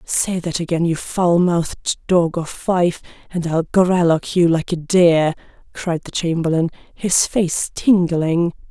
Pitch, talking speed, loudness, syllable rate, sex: 170 Hz, 150 wpm, -18 LUFS, 3.9 syllables/s, female